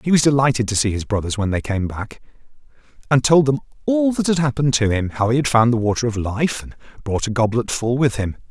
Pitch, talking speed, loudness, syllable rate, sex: 125 Hz, 245 wpm, -19 LUFS, 6.1 syllables/s, male